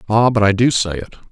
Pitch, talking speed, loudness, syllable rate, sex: 110 Hz, 275 wpm, -15 LUFS, 6.1 syllables/s, male